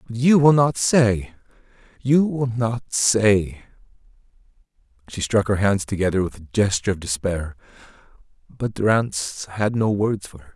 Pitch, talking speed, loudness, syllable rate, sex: 105 Hz, 140 wpm, -20 LUFS, 4.5 syllables/s, male